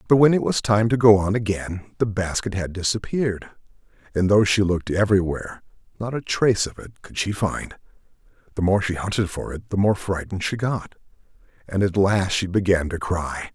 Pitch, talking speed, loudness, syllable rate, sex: 100 Hz, 195 wpm, -22 LUFS, 5.5 syllables/s, male